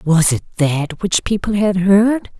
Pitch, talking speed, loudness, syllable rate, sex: 190 Hz, 175 wpm, -16 LUFS, 3.9 syllables/s, female